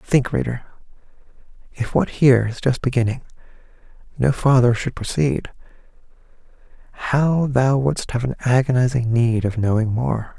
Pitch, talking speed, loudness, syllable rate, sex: 125 Hz, 125 wpm, -19 LUFS, 4.9 syllables/s, male